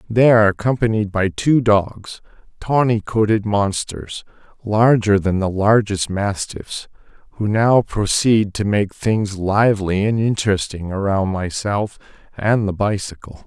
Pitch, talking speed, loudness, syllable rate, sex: 105 Hz, 125 wpm, -18 LUFS, 4.1 syllables/s, male